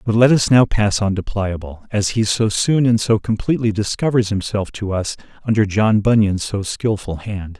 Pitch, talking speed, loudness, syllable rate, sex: 105 Hz, 195 wpm, -18 LUFS, 4.9 syllables/s, male